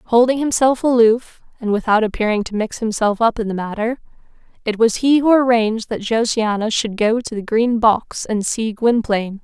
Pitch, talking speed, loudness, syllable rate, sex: 225 Hz, 185 wpm, -17 LUFS, 5.0 syllables/s, female